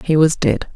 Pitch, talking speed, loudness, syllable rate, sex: 155 Hz, 240 wpm, -16 LUFS, 4.8 syllables/s, female